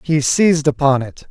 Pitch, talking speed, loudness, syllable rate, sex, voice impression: 145 Hz, 185 wpm, -15 LUFS, 5.0 syllables/s, male, very masculine, middle-aged, slightly thick, slightly tensed, powerful, slightly bright, soft, slightly muffled, slightly fluent, slightly cool, intellectual, refreshing, sincere, calm, mature, friendly, reassuring, slightly unique, slightly elegant, wild, slightly sweet, lively, kind, slightly modest